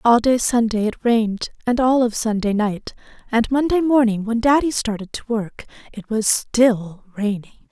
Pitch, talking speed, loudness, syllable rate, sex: 230 Hz, 170 wpm, -19 LUFS, 4.6 syllables/s, female